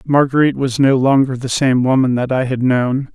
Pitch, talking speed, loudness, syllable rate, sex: 130 Hz, 210 wpm, -15 LUFS, 5.3 syllables/s, male